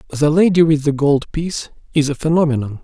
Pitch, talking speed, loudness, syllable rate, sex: 150 Hz, 190 wpm, -16 LUFS, 5.9 syllables/s, male